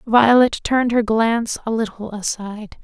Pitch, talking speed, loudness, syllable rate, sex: 225 Hz, 150 wpm, -18 LUFS, 5.0 syllables/s, female